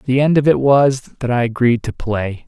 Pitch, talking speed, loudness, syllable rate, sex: 125 Hz, 245 wpm, -16 LUFS, 4.5 syllables/s, male